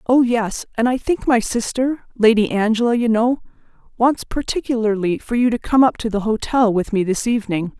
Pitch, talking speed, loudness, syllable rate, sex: 230 Hz, 175 wpm, -18 LUFS, 5.2 syllables/s, female